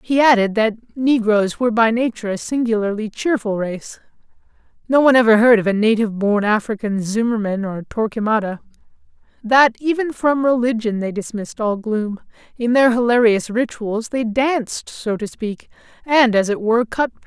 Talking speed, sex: 165 wpm, male